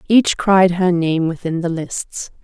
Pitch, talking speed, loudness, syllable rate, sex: 180 Hz, 175 wpm, -17 LUFS, 3.7 syllables/s, female